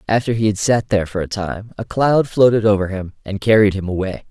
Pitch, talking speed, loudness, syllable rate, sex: 105 Hz, 235 wpm, -17 LUFS, 5.8 syllables/s, male